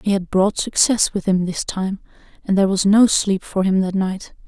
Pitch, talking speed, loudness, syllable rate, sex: 195 Hz, 230 wpm, -18 LUFS, 4.9 syllables/s, female